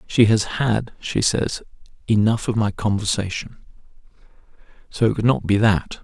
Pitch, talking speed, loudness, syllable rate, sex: 110 Hz, 150 wpm, -20 LUFS, 4.7 syllables/s, male